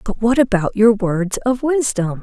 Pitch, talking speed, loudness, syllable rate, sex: 220 Hz, 190 wpm, -17 LUFS, 4.2 syllables/s, female